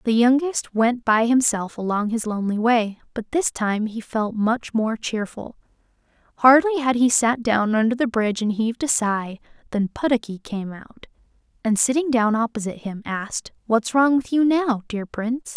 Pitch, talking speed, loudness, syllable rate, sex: 230 Hz, 175 wpm, -21 LUFS, 4.8 syllables/s, female